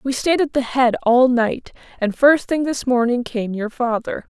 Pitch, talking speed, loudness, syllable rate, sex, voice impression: 250 Hz, 205 wpm, -18 LUFS, 4.4 syllables/s, female, very feminine, slightly middle-aged, very thin, tensed, slightly powerful, bright, soft, slightly clear, fluent, slightly raspy, cute, intellectual, refreshing, slightly sincere, calm, slightly friendly, reassuring, very unique, slightly elegant, slightly wild, slightly sweet, lively, kind, modest